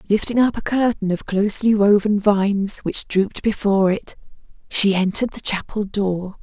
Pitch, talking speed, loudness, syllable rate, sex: 205 Hz, 160 wpm, -19 LUFS, 5.2 syllables/s, female